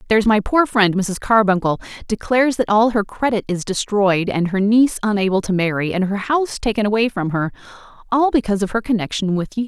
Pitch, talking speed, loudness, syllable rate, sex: 210 Hz, 200 wpm, -18 LUFS, 6.0 syllables/s, female